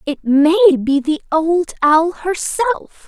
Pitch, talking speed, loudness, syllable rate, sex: 325 Hz, 135 wpm, -15 LUFS, 3.4 syllables/s, female